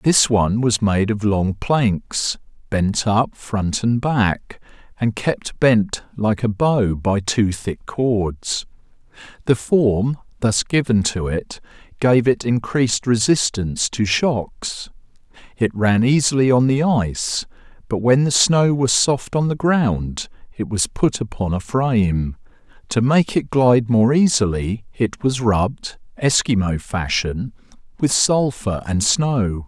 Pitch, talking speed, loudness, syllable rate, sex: 115 Hz, 140 wpm, -19 LUFS, 3.6 syllables/s, male